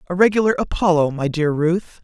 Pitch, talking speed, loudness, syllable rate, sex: 170 Hz, 175 wpm, -18 LUFS, 5.5 syllables/s, male